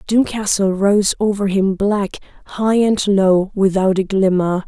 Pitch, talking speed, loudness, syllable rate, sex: 200 Hz, 155 wpm, -16 LUFS, 4.0 syllables/s, female